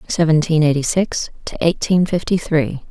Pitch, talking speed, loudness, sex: 160 Hz, 145 wpm, -17 LUFS, female